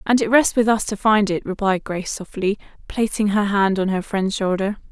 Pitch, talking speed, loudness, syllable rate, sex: 205 Hz, 220 wpm, -20 LUFS, 5.2 syllables/s, female